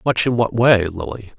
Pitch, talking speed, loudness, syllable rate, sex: 105 Hz, 215 wpm, -17 LUFS, 4.0 syllables/s, male